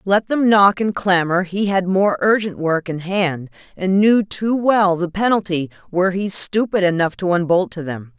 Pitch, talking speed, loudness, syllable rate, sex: 185 Hz, 190 wpm, -18 LUFS, 4.5 syllables/s, female